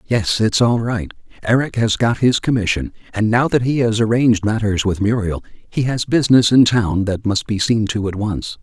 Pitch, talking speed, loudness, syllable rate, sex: 110 Hz, 210 wpm, -17 LUFS, 5.0 syllables/s, male